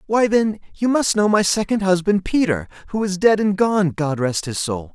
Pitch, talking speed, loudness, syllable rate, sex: 190 Hz, 220 wpm, -19 LUFS, 4.8 syllables/s, male